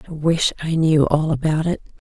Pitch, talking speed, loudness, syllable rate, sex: 155 Hz, 210 wpm, -19 LUFS, 5.1 syllables/s, female